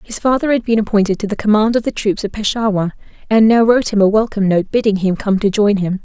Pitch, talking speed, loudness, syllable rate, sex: 210 Hz, 260 wpm, -15 LUFS, 6.4 syllables/s, female